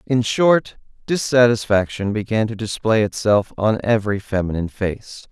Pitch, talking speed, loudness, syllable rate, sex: 110 Hz, 125 wpm, -19 LUFS, 4.7 syllables/s, male